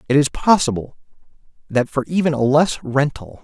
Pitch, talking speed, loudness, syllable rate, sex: 140 Hz, 155 wpm, -18 LUFS, 5.3 syllables/s, male